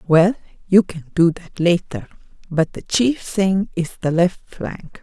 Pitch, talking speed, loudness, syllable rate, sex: 180 Hz, 165 wpm, -19 LUFS, 3.8 syllables/s, female